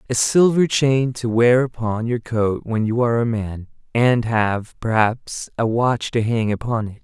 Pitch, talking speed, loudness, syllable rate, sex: 115 Hz, 190 wpm, -19 LUFS, 4.2 syllables/s, male